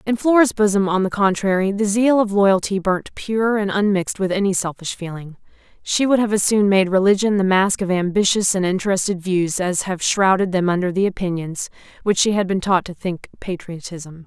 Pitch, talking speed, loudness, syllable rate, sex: 195 Hz, 200 wpm, -19 LUFS, 5.3 syllables/s, female